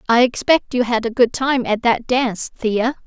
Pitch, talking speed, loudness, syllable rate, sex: 240 Hz, 215 wpm, -18 LUFS, 4.6 syllables/s, female